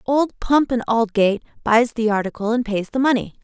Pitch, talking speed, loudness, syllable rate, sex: 230 Hz, 190 wpm, -19 LUFS, 5.4 syllables/s, female